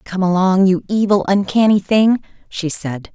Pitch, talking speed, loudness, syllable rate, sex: 190 Hz, 155 wpm, -16 LUFS, 4.5 syllables/s, female